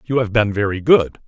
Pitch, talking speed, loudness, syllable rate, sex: 110 Hz, 235 wpm, -17 LUFS, 5.3 syllables/s, male